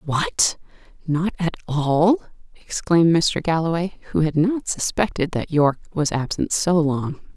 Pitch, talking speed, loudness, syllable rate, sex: 165 Hz, 140 wpm, -21 LUFS, 4.3 syllables/s, female